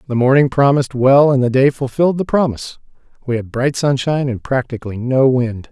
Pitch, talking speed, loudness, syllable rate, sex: 130 Hz, 190 wpm, -15 LUFS, 5.9 syllables/s, male